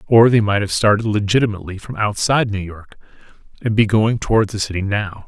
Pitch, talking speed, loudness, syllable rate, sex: 105 Hz, 195 wpm, -17 LUFS, 6.0 syllables/s, male